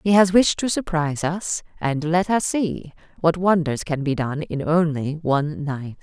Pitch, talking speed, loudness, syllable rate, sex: 165 Hz, 190 wpm, -21 LUFS, 4.4 syllables/s, female